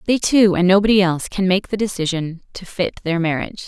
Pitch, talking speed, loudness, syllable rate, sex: 185 Hz, 210 wpm, -18 LUFS, 6.0 syllables/s, female